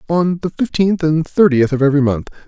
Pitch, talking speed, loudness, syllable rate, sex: 155 Hz, 195 wpm, -15 LUFS, 5.7 syllables/s, male